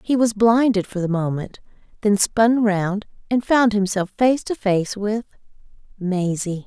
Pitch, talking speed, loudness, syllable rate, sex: 210 Hz, 145 wpm, -20 LUFS, 4.1 syllables/s, female